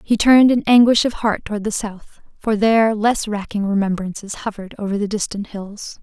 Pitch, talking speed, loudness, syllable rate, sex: 210 Hz, 190 wpm, -18 LUFS, 5.5 syllables/s, female